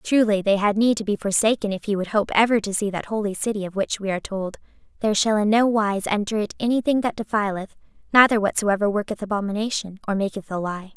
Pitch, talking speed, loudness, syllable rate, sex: 210 Hz, 220 wpm, -22 LUFS, 6.3 syllables/s, female